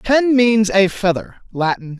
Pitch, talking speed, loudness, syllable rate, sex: 210 Hz, 150 wpm, -16 LUFS, 3.9 syllables/s, male